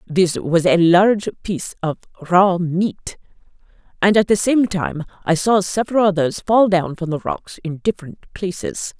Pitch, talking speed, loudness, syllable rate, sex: 185 Hz, 165 wpm, -18 LUFS, 4.7 syllables/s, female